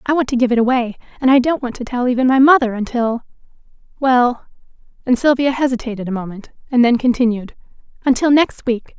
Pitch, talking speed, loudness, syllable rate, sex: 245 Hz, 180 wpm, -16 LUFS, 6.0 syllables/s, female